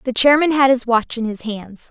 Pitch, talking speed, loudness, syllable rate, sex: 245 Hz, 250 wpm, -16 LUFS, 5.0 syllables/s, female